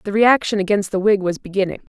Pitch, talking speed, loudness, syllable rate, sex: 200 Hz, 215 wpm, -18 LUFS, 6.3 syllables/s, female